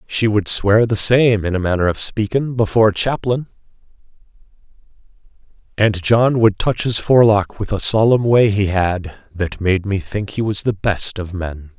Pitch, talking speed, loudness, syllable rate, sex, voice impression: 105 Hz, 175 wpm, -17 LUFS, 4.5 syllables/s, male, masculine, very adult-like, slightly thick, cool, slightly sincere, calm, slightly elegant